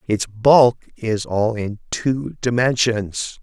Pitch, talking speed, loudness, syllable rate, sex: 115 Hz, 125 wpm, -19 LUFS, 3.1 syllables/s, male